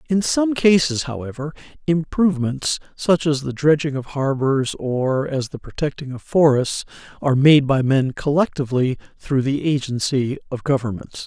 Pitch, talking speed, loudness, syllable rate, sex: 140 Hz, 145 wpm, -20 LUFS, 4.8 syllables/s, male